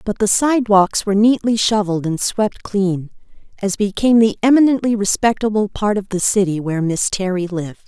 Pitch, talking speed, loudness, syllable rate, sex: 205 Hz, 170 wpm, -17 LUFS, 5.6 syllables/s, female